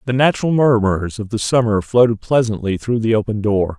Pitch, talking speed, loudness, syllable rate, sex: 110 Hz, 190 wpm, -17 LUFS, 5.5 syllables/s, male